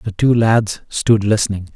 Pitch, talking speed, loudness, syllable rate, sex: 105 Hz, 170 wpm, -16 LUFS, 4.5 syllables/s, male